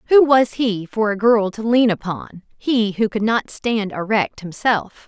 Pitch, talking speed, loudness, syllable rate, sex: 215 Hz, 175 wpm, -19 LUFS, 4.1 syllables/s, female